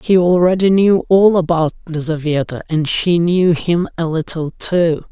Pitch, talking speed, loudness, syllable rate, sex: 170 Hz, 155 wpm, -15 LUFS, 4.3 syllables/s, male